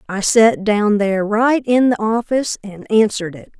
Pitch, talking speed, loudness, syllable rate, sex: 215 Hz, 185 wpm, -16 LUFS, 4.9 syllables/s, female